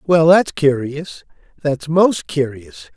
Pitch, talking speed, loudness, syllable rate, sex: 155 Hz, 100 wpm, -16 LUFS, 3.3 syllables/s, male